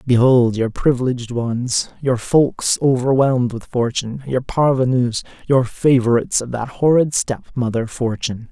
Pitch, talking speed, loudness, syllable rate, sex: 125 Hz, 125 wpm, -18 LUFS, 4.7 syllables/s, male